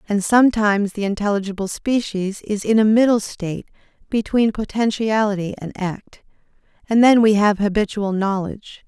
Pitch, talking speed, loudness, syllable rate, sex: 210 Hz, 135 wpm, -19 LUFS, 5.2 syllables/s, female